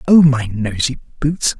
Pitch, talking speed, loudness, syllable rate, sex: 135 Hz, 150 wpm, -16 LUFS, 4.1 syllables/s, male